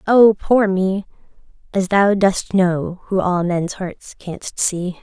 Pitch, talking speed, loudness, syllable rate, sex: 190 Hz, 155 wpm, -18 LUFS, 3.2 syllables/s, female